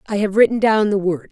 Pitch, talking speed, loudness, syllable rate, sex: 205 Hz, 275 wpm, -16 LUFS, 6.2 syllables/s, female